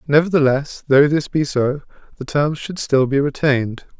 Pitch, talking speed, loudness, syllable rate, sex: 140 Hz, 165 wpm, -18 LUFS, 4.8 syllables/s, male